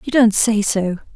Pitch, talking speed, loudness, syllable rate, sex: 215 Hz, 210 wpm, -17 LUFS, 4.4 syllables/s, female